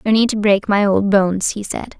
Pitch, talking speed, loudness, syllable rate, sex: 205 Hz, 270 wpm, -16 LUFS, 5.4 syllables/s, female